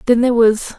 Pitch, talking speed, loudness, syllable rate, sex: 235 Hz, 230 wpm, -14 LUFS, 6.6 syllables/s, female